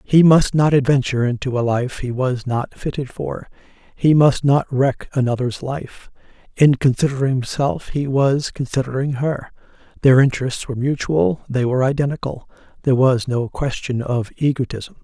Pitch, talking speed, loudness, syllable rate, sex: 130 Hz, 150 wpm, -19 LUFS, 5.0 syllables/s, male